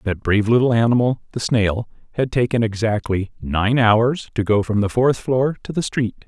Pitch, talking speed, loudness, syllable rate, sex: 115 Hz, 190 wpm, -19 LUFS, 4.8 syllables/s, male